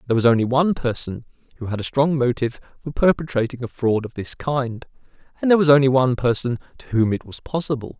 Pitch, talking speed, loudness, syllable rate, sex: 130 Hz, 210 wpm, -21 LUFS, 6.6 syllables/s, male